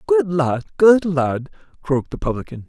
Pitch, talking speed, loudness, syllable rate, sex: 145 Hz, 155 wpm, -19 LUFS, 4.8 syllables/s, male